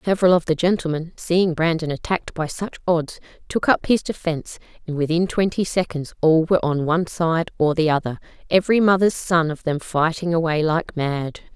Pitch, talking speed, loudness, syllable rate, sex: 165 Hz, 180 wpm, -21 LUFS, 5.4 syllables/s, female